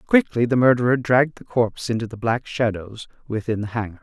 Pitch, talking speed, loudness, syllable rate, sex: 115 Hz, 195 wpm, -21 LUFS, 6.0 syllables/s, male